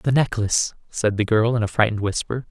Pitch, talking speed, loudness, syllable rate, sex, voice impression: 110 Hz, 215 wpm, -21 LUFS, 6.0 syllables/s, male, very masculine, slightly young, adult-like, slightly thick, tensed, slightly weak, bright, soft, clear, very fluent, cool, very intellectual, very refreshing, sincere, slightly calm, very friendly, very reassuring, slightly unique, elegant, very sweet, very lively, kind, light